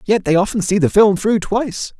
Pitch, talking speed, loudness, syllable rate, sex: 200 Hz, 240 wpm, -16 LUFS, 5.4 syllables/s, male